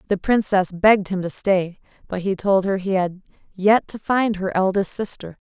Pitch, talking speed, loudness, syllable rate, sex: 195 Hz, 200 wpm, -20 LUFS, 4.7 syllables/s, female